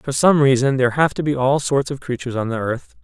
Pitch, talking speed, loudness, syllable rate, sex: 130 Hz, 275 wpm, -18 LUFS, 6.1 syllables/s, male